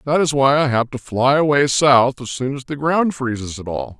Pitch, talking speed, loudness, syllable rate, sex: 135 Hz, 255 wpm, -17 LUFS, 5.0 syllables/s, male